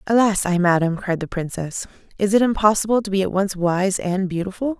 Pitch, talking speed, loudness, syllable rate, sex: 195 Hz, 200 wpm, -20 LUFS, 5.5 syllables/s, female